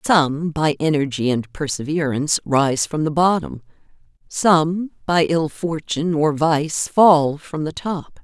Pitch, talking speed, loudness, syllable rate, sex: 155 Hz, 140 wpm, -19 LUFS, 3.9 syllables/s, female